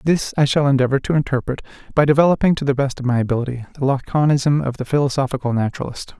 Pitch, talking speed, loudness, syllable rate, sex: 135 Hz, 195 wpm, -19 LUFS, 7.0 syllables/s, male